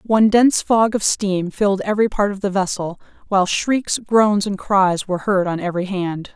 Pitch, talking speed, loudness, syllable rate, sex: 200 Hz, 200 wpm, -18 LUFS, 5.2 syllables/s, female